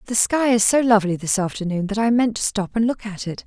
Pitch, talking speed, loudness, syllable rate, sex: 215 Hz, 275 wpm, -20 LUFS, 6.2 syllables/s, female